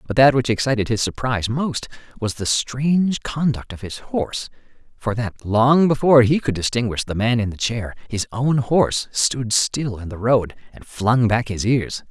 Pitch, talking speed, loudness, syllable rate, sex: 120 Hz, 195 wpm, -20 LUFS, 4.8 syllables/s, male